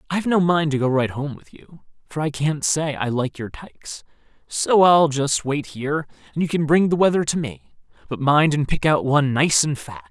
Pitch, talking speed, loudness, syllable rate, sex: 145 Hz, 230 wpm, -20 LUFS, 5.1 syllables/s, male